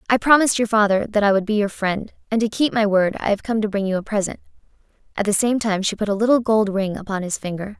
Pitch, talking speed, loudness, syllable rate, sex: 210 Hz, 275 wpm, -20 LUFS, 6.5 syllables/s, female